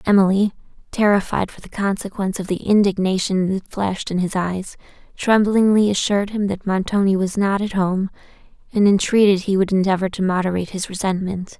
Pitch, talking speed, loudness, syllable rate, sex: 195 Hz, 160 wpm, -19 LUFS, 5.6 syllables/s, female